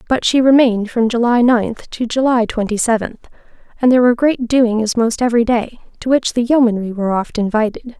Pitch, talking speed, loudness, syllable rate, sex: 235 Hz, 190 wpm, -15 LUFS, 5.6 syllables/s, female